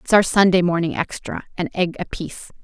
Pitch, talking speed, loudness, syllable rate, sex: 180 Hz, 160 wpm, -20 LUFS, 5.9 syllables/s, female